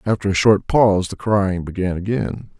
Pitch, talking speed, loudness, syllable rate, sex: 100 Hz, 185 wpm, -18 LUFS, 5.0 syllables/s, male